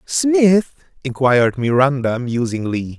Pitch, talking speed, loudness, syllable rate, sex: 140 Hz, 80 wpm, -16 LUFS, 3.9 syllables/s, male